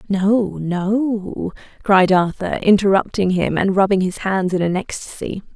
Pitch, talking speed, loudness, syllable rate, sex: 195 Hz, 140 wpm, -18 LUFS, 4.1 syllables/s, female